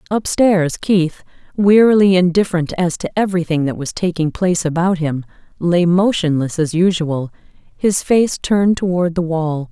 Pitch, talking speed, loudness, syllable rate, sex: 175 Hz, 140 wpm, -16 LUFS, 4.8 syllables/s, female